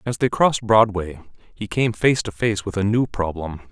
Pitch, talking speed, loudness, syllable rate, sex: 105 Hz, 210 wpm, -20 LUFS, 4.7 syllables/s, male